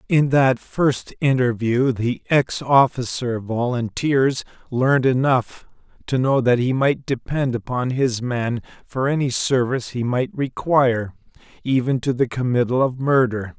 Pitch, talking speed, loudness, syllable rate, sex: 125 Hz, 135 wpm, -20 LUFS, 4.1 syllables/s, male